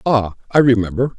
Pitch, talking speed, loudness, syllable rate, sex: 115 Hz, 150 wpm, -16 LUFS, 5.7 syllables/s, male